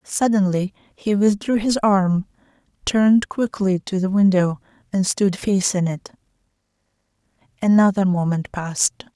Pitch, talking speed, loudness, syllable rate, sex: 195 Hz, 110 wpm, -19 LUFS, 4.4 syllables/s, female